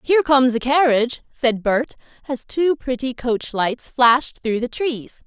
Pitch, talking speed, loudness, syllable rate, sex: 255 Hz, 170 wpm, -19 LUFS, 4.5 syllables/s, female